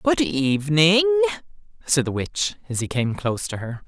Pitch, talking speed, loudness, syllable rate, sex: 170 Hz, 170 wpm, -21 LUFS, 5.0 syllables/s, male